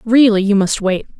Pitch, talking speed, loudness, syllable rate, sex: 210 Hz, 200 wpm, -14 LUFS, 5.1 syllables/s, female